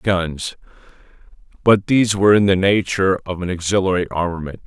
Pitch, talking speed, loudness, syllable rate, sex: 95 Hz, 140 wpm, -17 LUFS, 5.7 syllables/s, male